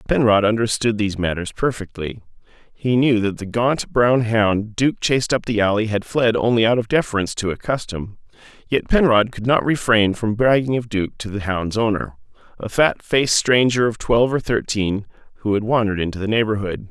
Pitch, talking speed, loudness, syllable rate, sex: 110 Hz, 190 wpm, -19 LUFS, 5.4 syllables/s, male